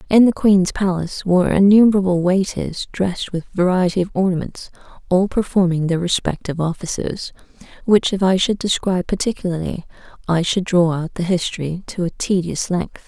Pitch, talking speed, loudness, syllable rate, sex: 185 Hz, 150 wpm, -18 LUFS, 5.4 syllables/s, female